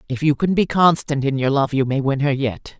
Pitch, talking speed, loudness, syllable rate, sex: 145 Hz, 280 wpm, -19 LUFS, 5.4 syllables/s, female